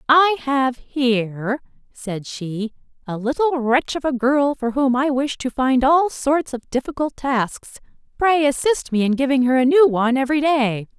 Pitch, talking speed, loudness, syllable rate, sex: 265 Hz, 180 wpm, -19 LUFS, 4.5 syllables/s, female